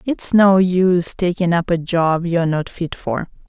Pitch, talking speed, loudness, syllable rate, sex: 175 Hz, 205 wpm, -17 LUFS, 4.7 syllables/s, female